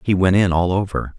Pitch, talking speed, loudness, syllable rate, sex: 95 Hz, 255 wpm, -18 LUFS, 5.6 syllables/s, male